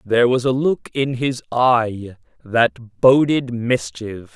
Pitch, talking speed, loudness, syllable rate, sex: 120 Hz, 140 wpm, -18 LUFS, 3.3 syllables/s, male